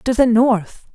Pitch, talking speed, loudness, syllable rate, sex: 230 Hz, 190 wpm, -15 LUFS, 3.6 syllables/s, female